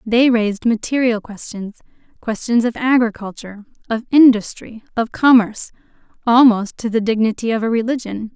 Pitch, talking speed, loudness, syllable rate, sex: 230 Hz, 130 wpm, -16 LUFS, 5.3 syllables/s, female